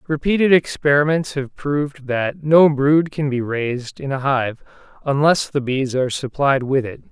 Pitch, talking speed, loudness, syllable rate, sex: 140 Hz, 170 wpm, -18 LUFS, 4.6 syllables/s, male